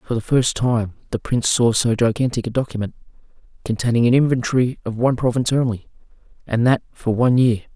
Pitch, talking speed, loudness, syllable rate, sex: 120 Hz, 180 wpm, -19 LUFS, 6.4 syllables/s, male